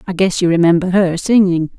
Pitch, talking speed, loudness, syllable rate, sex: 180 Hz, 200 wpm, -14 LUFS, 5.6 syllables/s, female